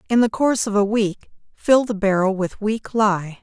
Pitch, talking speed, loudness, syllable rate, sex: 210 Hz, 210 wpm, -19 LUFS, 4.7 syllables/s, female